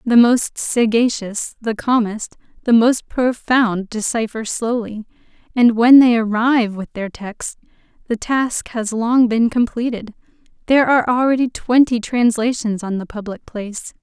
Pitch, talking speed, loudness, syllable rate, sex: 230 Hz, 135 wpm, -17 LUFS, 4.3 syllables/s, female